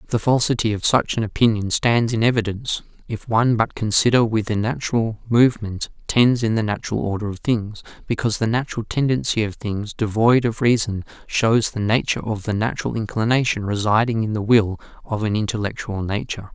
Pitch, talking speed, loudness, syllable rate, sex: 110 Hz, 170 wpm, -20 LUFS, 5.8 syllables/s, male